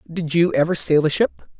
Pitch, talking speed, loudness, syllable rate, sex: 150 Hz, 225 wpm, -19 LUFS, 6.1 syllables/s, male